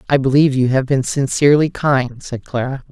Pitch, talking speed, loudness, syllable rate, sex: 135 Hz, 185 wpm, -16 LUFS, 5.6 syllables/s, female